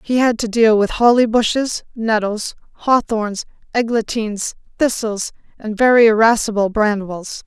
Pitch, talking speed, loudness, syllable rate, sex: 220 Hz, 120 wpm, -17 LUFS, 4.6 syllables/s, female